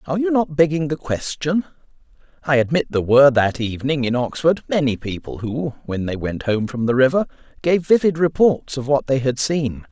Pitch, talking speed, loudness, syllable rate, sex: 140 Hz, 195 wpm, -19 LUFS, 5.5 syllables/s, male